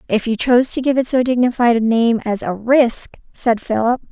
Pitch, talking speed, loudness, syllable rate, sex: 240 Hz, 220 wpm, -16 LUFS, 5.3 syllables/s, female